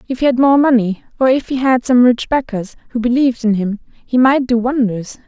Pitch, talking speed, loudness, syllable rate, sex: 245 Hz, 230 wpm, -15 LUFS, 5.6 syllables/s, female